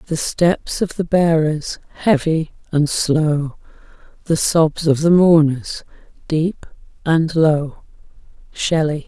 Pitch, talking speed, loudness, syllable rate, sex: 160 Hz, 110 wpm, -17 LUFS, 3.3 syllables/s, female